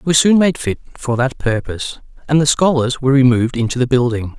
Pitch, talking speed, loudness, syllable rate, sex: 130 Hz, 220 wpm, -16 LUFS, 5.9 syllables/s, male